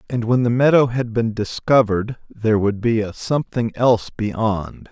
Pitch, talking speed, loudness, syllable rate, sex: 115 Hz, 170 wpm, -19 LUFS, 4.9 syllables/s, male